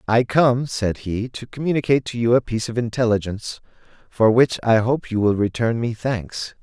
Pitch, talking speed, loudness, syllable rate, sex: 115 Hz, 190 wpm, -20 LUFS, 5.2 syllables/s, male